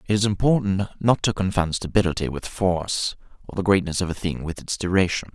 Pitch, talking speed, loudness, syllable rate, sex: 95 Hz, 200 wpm, -23 LUFS, 5.7 syllables/s, male